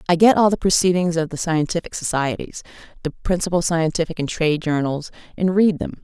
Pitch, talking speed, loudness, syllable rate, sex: 165 Hz, 180 wpm, -20 LUFS, 6.0 syllables/s, female